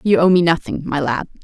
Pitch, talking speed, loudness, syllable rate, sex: 165 Hz, 250 wpm, -17 LUFS, 5.9 syllables/s, female